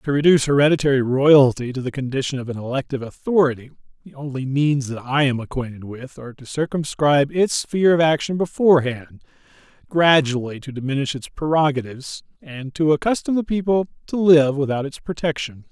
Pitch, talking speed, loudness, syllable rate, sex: 140 Hz, 160 wpm, -19 LUFS, 5.8 syllables/s, male